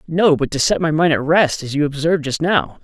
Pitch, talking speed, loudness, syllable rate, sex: 160 Hz, 275 wpm, -17 LUFS, 5.6 syllables/s, male